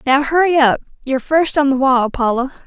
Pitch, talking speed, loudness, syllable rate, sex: 275 Hz, 200 wpm, -15 LUFS, 5.5 syllables/s, female